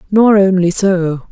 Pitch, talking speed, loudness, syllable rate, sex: 190 Hz, 135 wpm, -12 LUFS, 3.9 syllables/s, female